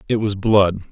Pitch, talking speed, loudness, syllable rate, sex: 100 Hz, 195 wpm, -17 LUFS, 4.4 syllables/s, male